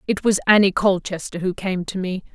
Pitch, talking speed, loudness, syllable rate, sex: 190 Hz, 205 wpm, -20 LUFS, 5.4 syllables/s, female